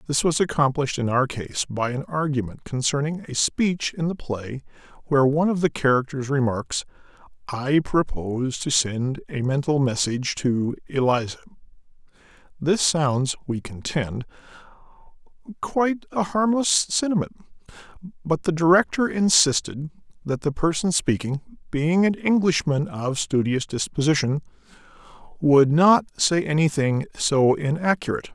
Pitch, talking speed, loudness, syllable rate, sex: 150 Hz, 125 wpm, -22 LUFS, 4.7 syllables/s, male